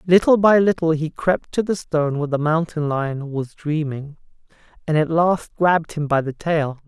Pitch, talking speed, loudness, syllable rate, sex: 160 Hz, 190 wpm, -20 LUFS, 4.8 syllables/s, male